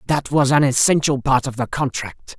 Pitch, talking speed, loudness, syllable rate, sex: 135 Hz, 200 wpm, -18 LUFS, 5.0 syllables/s, male